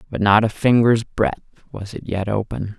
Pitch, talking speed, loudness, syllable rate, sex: 105 Hz, 195 wpm, -19 LUFS, 4.9 syllables/s, male